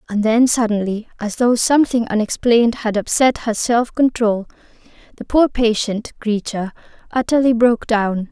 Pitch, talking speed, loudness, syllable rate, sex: 230 Hz, 135 wpm, -17 LUFS, 5.0 syllables/s, female